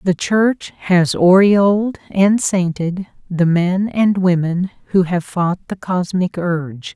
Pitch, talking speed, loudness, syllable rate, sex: 185 Hz, 140 wpm, -16 LUFS, 3.6 syllables/s, female